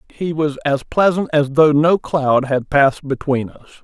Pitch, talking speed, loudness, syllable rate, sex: 145 Hz, 190 wpm, -16 LUFS, 4.5 syllables/s, male